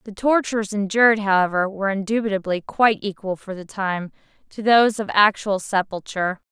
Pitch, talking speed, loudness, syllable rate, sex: 200 Hz, 145 wpm, -20 LUFS, 5.8 syllables/s, female